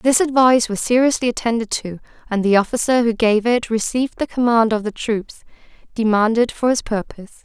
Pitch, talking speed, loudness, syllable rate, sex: 230 Hz, 175 wpm, -18 LUFS, 5.6 syllables/s, female